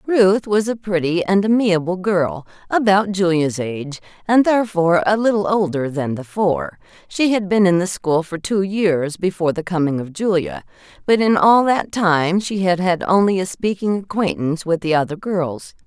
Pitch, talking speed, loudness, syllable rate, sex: 180 Hz, 180 wpm, -18 LUFS, 4.8 syllables/s, female